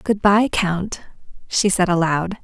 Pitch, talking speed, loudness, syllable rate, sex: 190 Hz, 150 wpm, -18 LUFS, 3.9 syllables/s, female